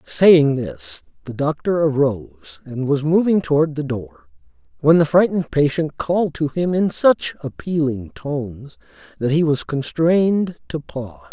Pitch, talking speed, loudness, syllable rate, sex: 150 Hz, 150 wpm, -19 LUFS, 4.6 syllables/s, male